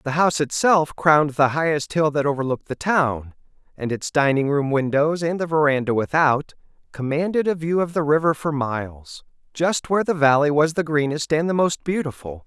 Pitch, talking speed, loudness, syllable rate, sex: 150 Hz, 190 wpm, -20 LUFS, 5.3 syllables/s, male